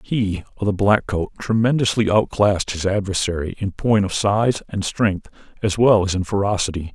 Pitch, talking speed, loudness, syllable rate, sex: 100 Hz, 175 wpm, -20 LUFS, 5.0 syllables/s, male